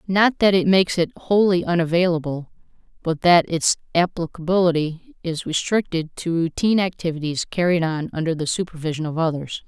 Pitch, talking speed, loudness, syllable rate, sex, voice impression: 170 Hz, 145 wpm, -21 LUFS, 5.5 syllables/s, female, very feminine, slightly gender-neutral, very adult-like, slightly thin, very tensed, powerful, slightly dark, slightly soft, clear, fluent, slightly raspy, slightly cute, cool, very intellectual, refreshing, slightly sincere, calm, very friendly, reassuring, unique, elegant, slightly wild, slightly sweet, lively, strict, slightly intense, slightly sharp, slightly light